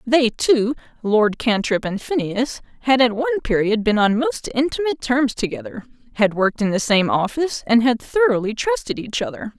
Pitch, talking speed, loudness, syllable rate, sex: 240 Hz, 170 wpm, -19 LUFS, 5.3 syllables/s, female